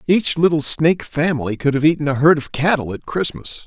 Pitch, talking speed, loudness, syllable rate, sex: 155 Hz, 215 wpm, -17 LUFS, 5.8 syllables/s, male